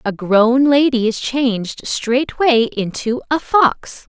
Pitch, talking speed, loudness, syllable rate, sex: 245 Hz, 130 wpm, -16 LUFS, 3.4 syllables/s, female